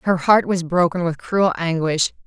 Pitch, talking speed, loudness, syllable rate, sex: 175 Hz, 185 wpm, -19 LUFS, 4.5 syllables/s, female